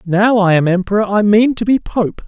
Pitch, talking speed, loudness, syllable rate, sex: 205 Hz, 240 wpm, -13 LUFS, 5.1 syllables/s, male